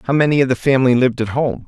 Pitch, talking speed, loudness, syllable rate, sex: 130 Hz, 285 wpm, -16 LUFS, 7.4 syllables/s, male